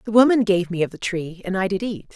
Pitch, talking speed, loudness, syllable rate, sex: 200 Hz, 305 wpm, -21 LUFS, 6.0 syllables/s, female